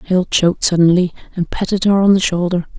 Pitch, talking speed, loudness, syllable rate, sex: 180 Hz, 195 wpm, -15 LUFS, 5.7 syllables/s, female